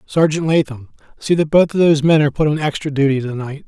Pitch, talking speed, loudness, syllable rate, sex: 150 Hz, 245 wpm, -16 LUFS, 6.5 syllables/s, male